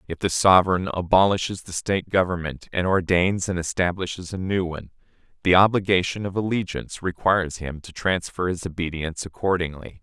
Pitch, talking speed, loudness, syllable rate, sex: 90 Hz, 150 wpm, -23 LUFS, 5.7 syllables/s, male